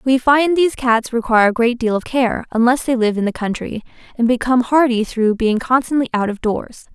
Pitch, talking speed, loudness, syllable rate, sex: 240 Hz, 215 wpm, -17 LUFS, 5.5 syllables/s, female